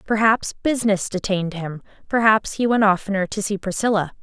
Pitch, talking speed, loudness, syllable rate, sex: 205 Hz, 155 wpm, -20 LUFS, 5.7 syllables/s, female